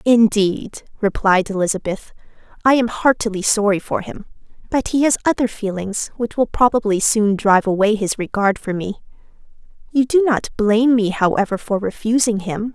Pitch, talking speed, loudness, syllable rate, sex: 215 Hz, 155 wpm, -18 LUFS, 5.1 syllables/s, female